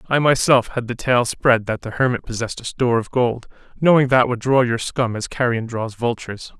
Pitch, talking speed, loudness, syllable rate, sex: 120 Hz, 220 wpm, -19 LUFS, 5.5 syllables/s, male